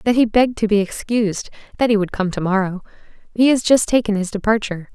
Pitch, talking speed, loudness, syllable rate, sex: 215 Hz, 220 wpm, -18 LUFS, 6.4 syllables/s, female